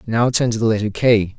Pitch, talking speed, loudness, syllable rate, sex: 110 Hz, 260 wpm, -17 LUFS, 5.6 syllables/s, male